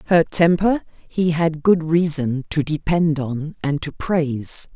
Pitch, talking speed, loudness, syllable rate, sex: 160 Hz, 150 wpm, -20 LUFS, 3.8 syllables/s, female